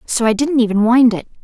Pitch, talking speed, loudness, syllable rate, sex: 240 Hz, 250 wpm, -14 LUFS, 5.8 syllables/s, female